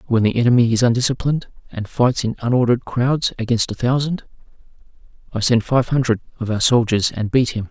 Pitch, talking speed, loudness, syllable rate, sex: 120 Hz, 180 wpm, -18 LUFS, 6.0 syllables/s, male